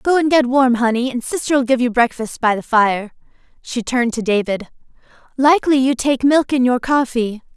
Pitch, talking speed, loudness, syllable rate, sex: 250 Hz, 190 wpm, -17 LUFS, 5.1 syllables/s, female